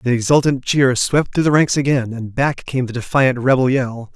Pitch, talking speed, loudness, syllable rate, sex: 130 Hz, 215 wpm, -17 LUFS, 4.9 syllables/s, male